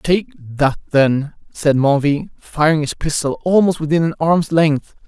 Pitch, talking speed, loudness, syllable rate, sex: 150 Hz, 155 wpm, -17 LUFS, 4.5 syllables/s, male